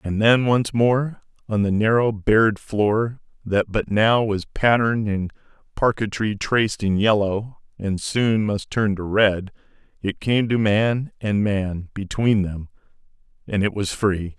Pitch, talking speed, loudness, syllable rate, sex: 105 Hz, 150 wpm, -21 LUFS, 3.9 syllables/s, male